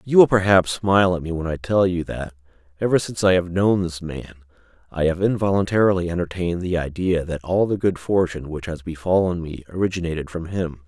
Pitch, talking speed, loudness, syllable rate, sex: 90 Hz, 200 wpm, -21 LUFS, 6.0 syllables/s, male